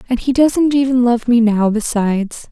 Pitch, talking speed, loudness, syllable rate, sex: 240 Hz, 190 wpm, -15 LUFS, 4.7 syllables/s, female